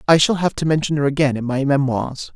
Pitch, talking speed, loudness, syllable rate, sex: 145 Hz, 255 wpm, -18 LUFS, 5.9 syllables/s, male